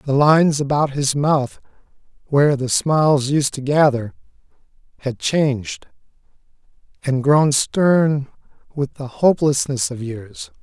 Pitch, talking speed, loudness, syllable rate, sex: 140 Hz, 120 wpm, -18 LUFS, 4.1 syllables/s, male